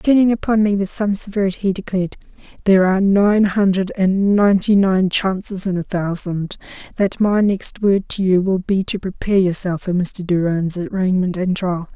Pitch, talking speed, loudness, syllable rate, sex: 190 Hz, 180 wpm, -18 LUFS, 5.1 syllables/s, female